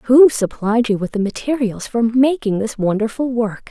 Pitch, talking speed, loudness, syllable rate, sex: 230 Hz, 180 wpm, -17 LUFS, 4.6 syllables/s, female